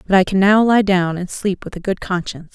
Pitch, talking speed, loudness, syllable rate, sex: 190 Hz, 285 wpm, -17 LUFS, 5.8 syllables/s, female